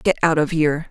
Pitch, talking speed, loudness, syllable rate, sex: 155 Hz, 265 wpm, -19 LUFS, 7.0 syllables/s, female